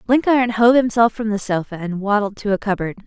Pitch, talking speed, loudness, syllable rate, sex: 215 Hz, 215 wpm, -18 LUFS, 6.0 syllables/s, female